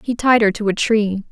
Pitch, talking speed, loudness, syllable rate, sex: 215 Hz, 275 wpm, -16 LUFS, 5.2 syllables/s, female